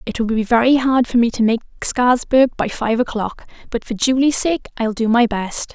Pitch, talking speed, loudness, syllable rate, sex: 235 Hz, 220 wpm, -17 LUFS, 5.0 syllables/s, female